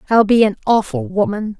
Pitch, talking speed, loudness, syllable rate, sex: 215 Hz, 190 wpm, -16 LUFS, 5.3 syllables/s, female